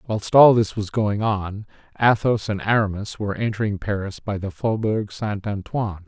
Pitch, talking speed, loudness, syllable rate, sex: 105 Hz, 170 wpm, -21 LUFS, 4.9 syllables/s, male